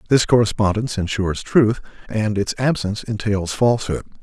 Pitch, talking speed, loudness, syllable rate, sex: 105 Hz, 130 wpm, -20 LUFS, 5.6 syllables/s, male